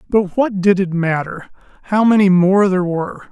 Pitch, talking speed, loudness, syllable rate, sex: 190 Hz, 180 wpm, -15 LUFS, 5.2 syllables/s, male